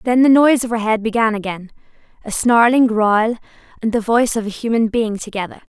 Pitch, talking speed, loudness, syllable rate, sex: 225 Hz, 180 wpm, -16 LUFS, 5.8 syllables/s, female